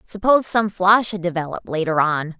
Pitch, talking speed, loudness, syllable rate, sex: 185 Hz, 150 wpm, -19 LUFS, 5.3 syllables/s, female